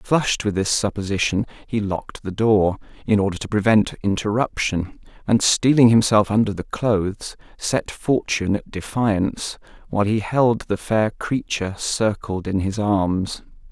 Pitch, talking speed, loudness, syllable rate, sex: 105 Hz, 145 wpm, -21 LUFS, 4.6 syllables/s, male